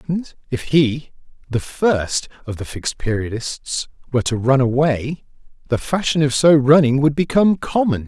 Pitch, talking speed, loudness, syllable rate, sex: 140 Hz, 155 wpm, -18 LUFS, 4.8 syllables/s, male